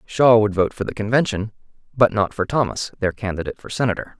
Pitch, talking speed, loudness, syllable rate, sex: 105 Hz, 200 wpm, -20 LUFS, 6.2 syllables/s, male